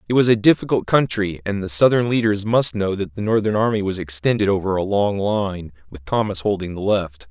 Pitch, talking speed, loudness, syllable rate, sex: 100 Hz, 215 wpm, -19 LUFS, 5.5 syllables/s, male